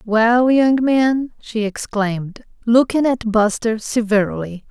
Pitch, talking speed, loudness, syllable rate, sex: 230 Hz, 115 wpm, -17 LUFS, 3.8 syllables/s, female